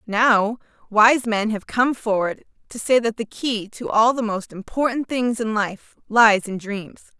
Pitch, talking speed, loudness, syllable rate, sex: 220 Hz, 185 wpm, -20 LUFS, 4.0 syllables/s, female